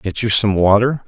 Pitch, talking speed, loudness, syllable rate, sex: 105 Hz, 225 wpm, -15 LUFS, 4.9 syllables/s, male